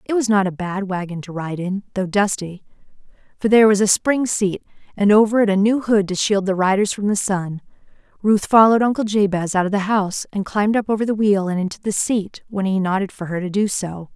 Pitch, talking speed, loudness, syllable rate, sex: 200 Hz, 235 wpm, -19 LUFS, 5.8 syllables/s, female